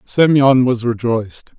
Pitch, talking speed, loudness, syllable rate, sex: 125 Hz, 115 wpm, -14 LUFS, 4.2 syllables/s, male